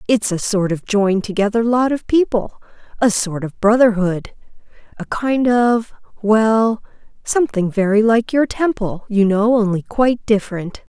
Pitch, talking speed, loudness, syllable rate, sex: 215 Hz, 130 wpm, -17 LUFS, 4.6 syllables/s, female